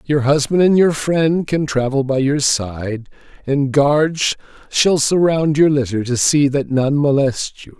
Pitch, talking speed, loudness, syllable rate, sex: 145 Hz, 170 wpm, -16 LUFS, 3.9 syllables/s, male